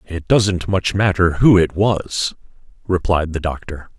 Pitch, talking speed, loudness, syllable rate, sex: 90 Hz, 150 wpm, -17 LUFS, 3.9 syllables/s, male